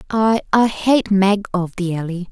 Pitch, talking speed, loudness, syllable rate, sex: 195 Hz, 155 wpm, -17 LUFS, 4.1 syllables/s, female